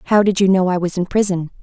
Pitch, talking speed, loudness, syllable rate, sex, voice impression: 185 Hz, 295 wpm, -17 LUFS, 6.0 syllables/s, female, feminine, adult-like, slightly fluent, slightly intellectual, slightly elegant